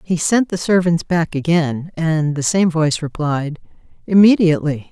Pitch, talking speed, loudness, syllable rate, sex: 165 Hz, 145 wpm, -16 LUFS, 4.6 syllables/s, female